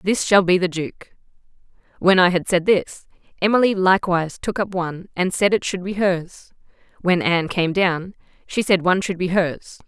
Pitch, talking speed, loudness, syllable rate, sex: 180 Hz, 190 wpm, -19 LUFS, 5.1 syllables/s, female